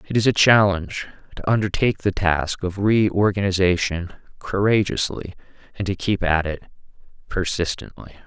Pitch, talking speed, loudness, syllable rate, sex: 95 Hz, 125 wpm, -21 LUFS, 5.0 syllables/s, male